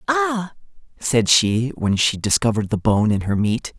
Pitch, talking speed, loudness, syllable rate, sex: 120 Hz, 175 wpm, -19 LUFS, 4.5 syllables/s, male